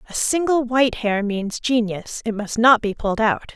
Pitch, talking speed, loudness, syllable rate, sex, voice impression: 230 Hz, 205 wpm, -20 LUFS, 5.0 syllables/s, female, feminine, adult-like, tensed, powerful, slightly bright, clear, raspy, intellectual, elegant, lively, slightly strict, sharp